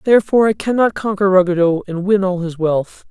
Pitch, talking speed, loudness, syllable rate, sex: 185 Hz, 195 wpm, -16 LUFS, 5.7 syllables/s, male